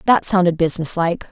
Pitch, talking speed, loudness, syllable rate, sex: 180 Hz, 180 wpm, -17 LUFS, 6.2 syllables/s, female